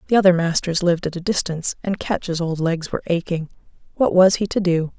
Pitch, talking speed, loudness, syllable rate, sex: 175 Hz, 215 wpm, -20 LUFS, 6.0 syllables/s, female